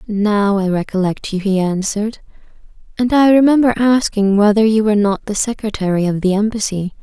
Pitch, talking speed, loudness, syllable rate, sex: 210 Hz, 160 wpm, -15 LUFS, 5.5 syllables/s, female